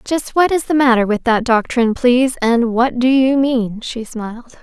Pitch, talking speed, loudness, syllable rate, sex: 245 Hz, 210 wpm, -15 LUFS, 4.8 syllables/s, female